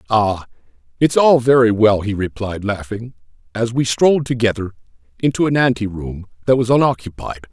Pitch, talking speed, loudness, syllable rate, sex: 115 Hz, 150 wpm, -17 LUFS, 5.4 syllables/s, male